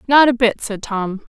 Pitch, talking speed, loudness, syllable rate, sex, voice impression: 230 Hz, 225 wpm, -17 LUFS, 4.4 syllables/s, female, feminine, very adult-like, intellectual, slightly strict